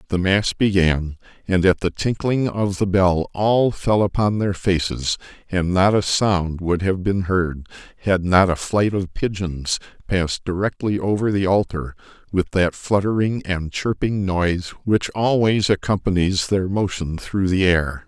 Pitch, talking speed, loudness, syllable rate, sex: 95 Hz, 160 wpm, -20 LUFS, 4.2 syllables/s, male